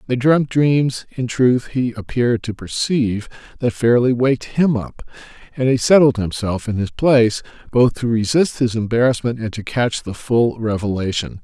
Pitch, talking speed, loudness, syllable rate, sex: 120 Hz, 170 wpm, -18 LUFS, 4.8 syllables/s, male